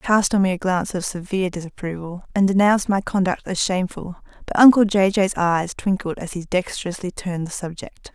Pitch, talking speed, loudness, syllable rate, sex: 185 Hz, 200 wpm, -20 LUFS, 5.9 syllables/s, female